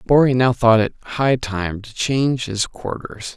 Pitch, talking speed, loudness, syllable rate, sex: 120 Hz, 180 wpm, -19 LUFS, 3.9 syllables/s, male